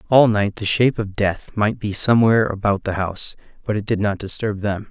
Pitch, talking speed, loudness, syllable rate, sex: 105 Hz, 220 wpm, -20 LUFS, 5.6 syllables/s, male